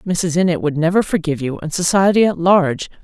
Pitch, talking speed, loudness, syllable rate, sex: 170 Hz, 195 wpm, -16 LUFS, 6.1 syllables/s, female